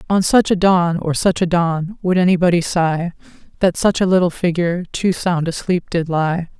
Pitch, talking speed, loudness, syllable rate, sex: 175 Hz, 190 wpm, -17 LUFS, 4.8 syllables/s, female